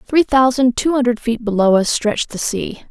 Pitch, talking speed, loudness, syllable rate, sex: 240 Hz, 205 wpm, -16 LUFS, 5.1 syllables/s, female